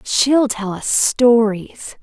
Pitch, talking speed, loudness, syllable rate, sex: 230 Hz, 120 wpm, -15 LUFS, 2.7 syllables/s, female